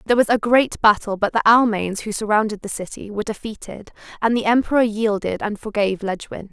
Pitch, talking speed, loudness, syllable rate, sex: 215 Hz, 195 wpm, -19 LUFS, 5.9 syllables/s, female